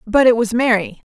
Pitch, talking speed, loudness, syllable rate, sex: 230 Hz, 215 wpm, -15 LUFS, 5.4 syllables/s, female